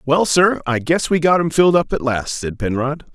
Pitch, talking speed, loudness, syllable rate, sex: 150 Hz, 250 wpm, -17 LUFS, 5.1 syllables/s, male